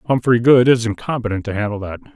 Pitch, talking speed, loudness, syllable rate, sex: 115 Hz, 195 wpm, -17 LUFS, 6.6 syllables/s, male